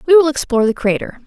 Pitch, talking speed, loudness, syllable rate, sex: 265 Hz, 235 wpm, -15 LUFS, 7.3 syllables/s, female